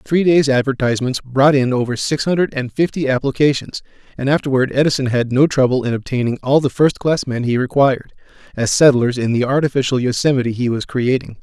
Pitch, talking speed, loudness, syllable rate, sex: 130 Hz, 180 wpm, -16 LUFS, 6.0 syllables/s, male